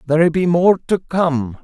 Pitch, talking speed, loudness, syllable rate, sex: 165 Hz, 185 wpm, -16 LUFS, 4.3 syllables/s, male